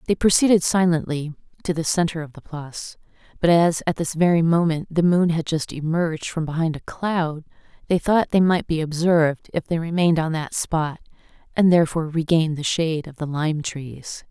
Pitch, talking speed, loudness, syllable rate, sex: 165 Hz, 190 wpm, -21 LUFS, 5.4 syllables/s, female